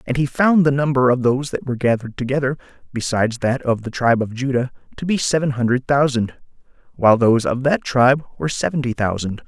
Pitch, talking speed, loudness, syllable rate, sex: 130 Hz, 195 wpm, -19 LUFS, 6.5 syllables/s, male